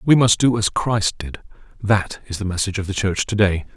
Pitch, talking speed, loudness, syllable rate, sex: 100 Hz, 225 wpm, -19 LUFS, 5.5 syllables/s, male